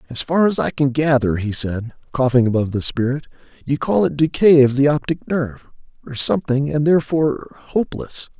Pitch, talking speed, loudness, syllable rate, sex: 135 Hz, 180 wpm, -18 LUFS, 5.6 syllables/s, male